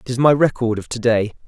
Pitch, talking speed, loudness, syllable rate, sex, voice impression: 120 Hz, 285 wpm, -18 LUFS, 6.0 syllables/s, male, masculine, adult-like, tensed, powerful, bright, clear, fluent, cool, friendly, wild, lively, slightly intense